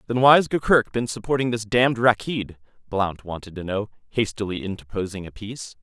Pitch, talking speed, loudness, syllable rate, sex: 110 Hz, 165 wpm, -23 LUFS, 5.5 syllables/s, male